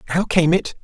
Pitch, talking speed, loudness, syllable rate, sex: 170 Hz, 215 wpm, -18 LUFS, 6.1 syllables/s, male